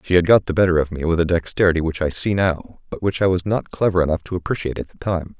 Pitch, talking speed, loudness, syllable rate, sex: 90 Hz, 280 wpm, -20 LUFS, 6.5 syllables/s, male